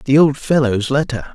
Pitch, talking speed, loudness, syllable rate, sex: 135 Hz, 180 wpm, -16 LUFS, 4.9 syllables/s, male